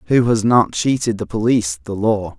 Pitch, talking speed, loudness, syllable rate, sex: 110 Hz, 200 wpm, -17 LUFS, 5.2 syllables/s, male